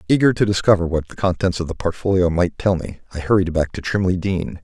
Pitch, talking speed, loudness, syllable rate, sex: 90 Hz, 235 wpm, -19 LUFS, 6.0 syllables/s, male